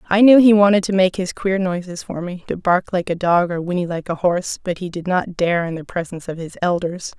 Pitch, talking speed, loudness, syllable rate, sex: 180 Hz, 250 wpm, -18 LUFS, 5.7 syllables/s, female